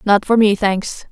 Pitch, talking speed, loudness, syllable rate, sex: 205 Hz, 215 wpm, -15 LUFS, 4.0 syllables/s, female